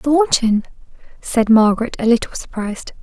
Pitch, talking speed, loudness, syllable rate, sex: 240 Hz, 120 wpm, -17 LUFS, 5.1 syllables/s, female